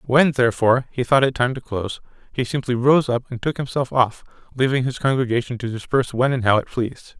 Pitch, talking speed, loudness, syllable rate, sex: 125 Hz, 215 wpm, -20 LUFS, 6.0 syllables/s, male